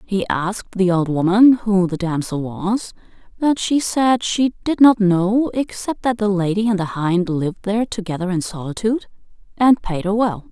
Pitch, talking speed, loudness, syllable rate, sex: 200 Hz, 185 wpm, -18 LUFS, 4.7 syllables/s, female